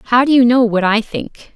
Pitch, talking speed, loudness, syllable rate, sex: 235 Hz, 270 wpm, -13 LUFS, 4.6 syllables/s, female